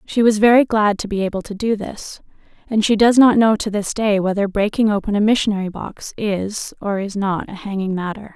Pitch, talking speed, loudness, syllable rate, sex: 210 Hz, 225 wpm, -18 LUFS, 5.4 syllables/s, female